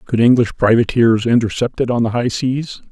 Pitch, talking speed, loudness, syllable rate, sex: 120 Hz, 185 wpm, -15 LUFS, 5.3 syllables/s, male